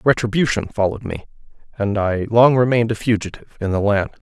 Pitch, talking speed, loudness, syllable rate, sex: 110 Hz, 165 wpm, -18 LUFS, 6.3 syllables/s, male